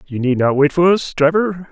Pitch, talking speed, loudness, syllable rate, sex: 160 Hz, 245 wpm, -15 LUFS, 5.0 syllables/s, male